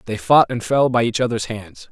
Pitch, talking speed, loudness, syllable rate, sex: 115 Hz, 250 wpm, -18 LUFS, 5.2 syllables/s, male